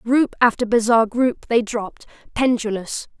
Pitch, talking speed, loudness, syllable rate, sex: 230 Hz, 130 wpm, -19 LUFS, 4.7 syllables/s, female